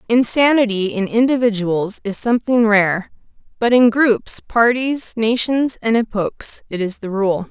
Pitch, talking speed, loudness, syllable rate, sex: 225 Hz, 130 wpm, -17 LUFS, 4.2 syllables/s, female